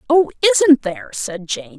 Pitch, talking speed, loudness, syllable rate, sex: 285 Hz, 170 wpm, -17 LUFS, 4.1 syllables/s, female